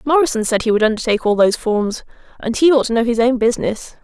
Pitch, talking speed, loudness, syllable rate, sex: 235 Hz, 240 wpm, -16 LUFS, 6.8 syllables/s, female